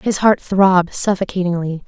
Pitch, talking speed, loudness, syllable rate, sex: 185 Hz, 130 wpm, -16 LUFS, 4.9 syllables/s, female